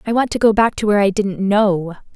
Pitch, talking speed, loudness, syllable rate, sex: 205 Hz, 250 wpm, -16 LUFS, 6.0 syllables/s, female